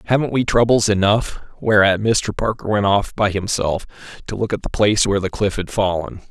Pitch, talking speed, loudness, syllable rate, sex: 105 Hz, 200 wpm, -18 LUFS, 5.6 syllables/s, male